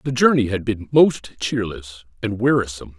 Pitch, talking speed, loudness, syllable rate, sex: 115 Hz, 160 wpm, -20 LUFS, 5.0 syllables/s, male